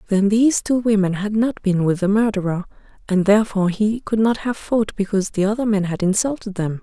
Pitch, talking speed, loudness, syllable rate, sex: 205 Hz, 210 wpm, -19 LUFS, 5.9 syllables/s, female